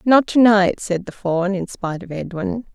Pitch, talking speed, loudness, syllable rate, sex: 195 Hz, 220 wpm, -19 LUFS, 4.6 syllables/s, female